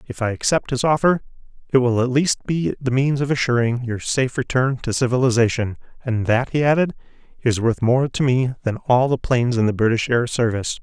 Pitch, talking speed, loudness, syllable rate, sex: 125 Hz, 205 wpm, -20 LUFS, 5.7 syllables/s, male